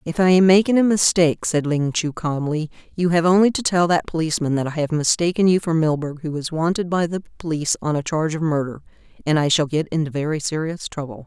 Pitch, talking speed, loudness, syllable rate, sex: 160 Hz, 230 wpm, -20 LUFS, 6.1 syllables/s, female